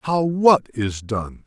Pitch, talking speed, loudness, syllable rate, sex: 135 Hz, 165 wpm, -20 LUFS, 3.1 syllables/s, male